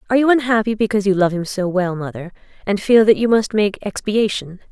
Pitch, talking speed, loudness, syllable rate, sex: 205 Hz, 215 wpm, -17 LUFS, 6.2 syllables/s, female